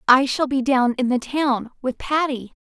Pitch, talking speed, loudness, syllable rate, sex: 260 Hz, 180 wpm, -21 LUFS, 4.4 syllables/s, female